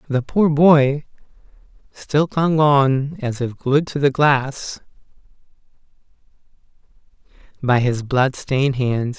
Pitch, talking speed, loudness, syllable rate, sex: 140 Hz, 110 wpm, -18 LUFS, 3.3 syllables/s, male